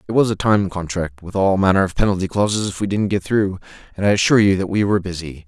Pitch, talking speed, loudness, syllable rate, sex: 95 Hz, 265 wpm, -18 LUFS, 6.7 syllables/s, male